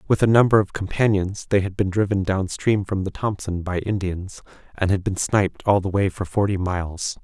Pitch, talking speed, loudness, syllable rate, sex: 100 Hz, 215 wpm, -22 LUFS, 5.3 syllables/s, male